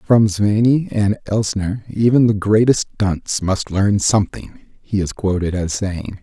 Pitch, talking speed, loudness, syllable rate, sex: 105 Hz, 155 wpm, -17 LUFS, 4.1 syllables/s, male